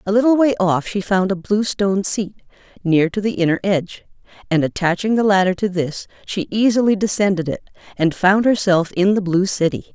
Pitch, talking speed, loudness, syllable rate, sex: 190 Hz, 185 wpm, -18 LUFS, 5.5 syllables/s, female